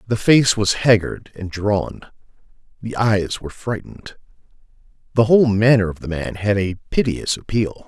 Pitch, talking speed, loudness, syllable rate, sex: 105 Hz, 150 wpm, -19 LUFS, 4.8 syllables/s, male